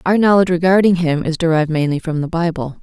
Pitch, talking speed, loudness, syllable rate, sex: 170 Hz, 210 wpm, -16 LUFS, 6.7 syllables/s, female